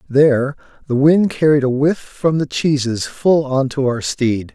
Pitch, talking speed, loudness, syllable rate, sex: 140 Hz, 185 wpm, -16 LUFS, 4.2 syllables/s, male